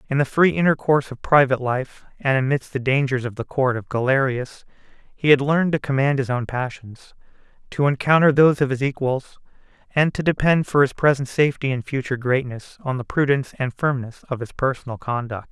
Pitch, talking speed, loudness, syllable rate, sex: 135 Hz, 190 wpm, -21 LUFS, 5.8 syllables/s, male